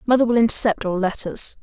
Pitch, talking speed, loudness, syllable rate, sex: 215 Hz, 185 wpm, -19 LUFS, 6.1 syllables/s, female